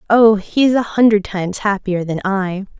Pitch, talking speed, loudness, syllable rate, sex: 205 Hz, 195 wpm, -16 LUFS, 4.9 syllables/s, female